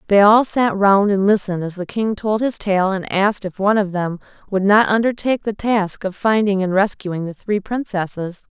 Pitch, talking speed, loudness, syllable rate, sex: 200 Hz, 210 wpm, -18 LUFS, 5.1 syllables/s, female